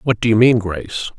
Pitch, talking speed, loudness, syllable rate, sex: 110 Hz, 255 wpm, -16 LUFS, 5.8 syllables/s, male